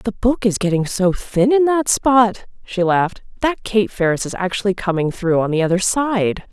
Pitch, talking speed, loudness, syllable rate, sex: 205 Hz, 200 wpm, -18 LUFS, 4.8 syllables/s, female